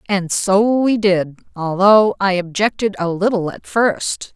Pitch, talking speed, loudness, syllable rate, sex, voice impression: 195 Hz, 150 wpm, -16 LUFS, 3.8 syllables/s, female, slightly masculine, slightly feminine, very gender-neutral, slightly adult-like, slightly middle-aged, slightly thick, tensed, slightly powerful, bright, slightly soft, very clear, fluent, slightly nasal, slightly cool, very intellectual, very refreshing, sincere, slightly calm, slightly friendly, very unique, very wild, sweet, lively, kind